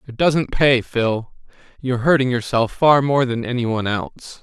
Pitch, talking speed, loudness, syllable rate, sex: 125 Hz, 175 wpm, -18 LUFS, 5.0 syllables/s, male